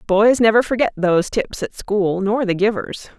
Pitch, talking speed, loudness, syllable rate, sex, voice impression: 210 Hz, 190 wpm, -18 LUFS, 4.8 syllables/s, female, feminine, adult-like, fluent, slightly intellectual, slightly friendly, slightly elegant